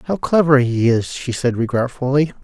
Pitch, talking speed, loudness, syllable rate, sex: 135 Hz, 170 wpm, -17 LUFS, 5.0 syllables/s, male